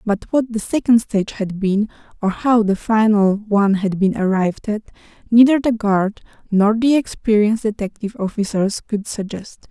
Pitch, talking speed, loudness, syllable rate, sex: 210 Hz, 160 wpm, -18 LUFS, 5.0 syllables/s, female